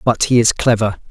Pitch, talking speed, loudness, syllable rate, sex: 115 Hz, 215 wpm, -15 LUFS, 5.4 syllables/s, male